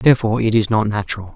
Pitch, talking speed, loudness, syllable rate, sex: 110 Hz, 220 wpm, -18 LUFS, 7.7 syllables/s, male